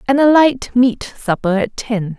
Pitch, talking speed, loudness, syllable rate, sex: 235 Hz, 195 wpm, -15 LUFS, 4.0 syllables/s, female